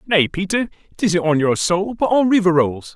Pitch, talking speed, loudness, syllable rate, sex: 180 Hz, 185 wpm, -18 LUFS, 4.8 syllables/s, male